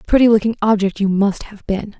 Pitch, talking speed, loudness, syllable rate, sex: 210 Hz, 240 wpm, -16 LUFS, 6.0 syllables/s, female